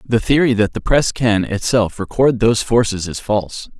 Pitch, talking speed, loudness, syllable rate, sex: 110 Hz, 190 wpm, -16 LUFS, 5.0 syllables/s, male